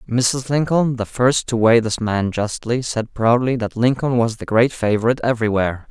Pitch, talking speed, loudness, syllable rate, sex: 120 Hz, 185 wpm, -18 LUFS, 5.0 syllables/s, male